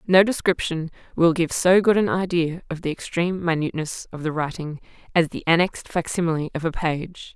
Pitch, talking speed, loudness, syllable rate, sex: 165 Hz, 180 wpm, -22 LUFS, 5.6 syllables/s, female